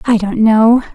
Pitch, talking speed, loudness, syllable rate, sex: 220 Hz, 190 wpm, -11 LUFS, 4.0 syllables/s, female